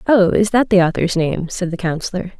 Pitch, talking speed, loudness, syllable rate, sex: 185 Hz, 225 wpm, -17 LUFS, 5.5 syllables/s, female